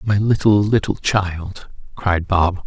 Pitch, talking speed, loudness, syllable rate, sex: 95 Hz, 135 wpm, -18 LUFS, 3.5 syllables/s, male